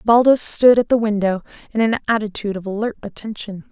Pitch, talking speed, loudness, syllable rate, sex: 215 Hz, 180 wpm, -18 LUFS, 6.0 syllables/s, female